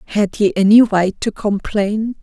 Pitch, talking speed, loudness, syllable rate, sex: 205 Hz, 160 wpm, -15 LUFS, 4.0 syllables/s, female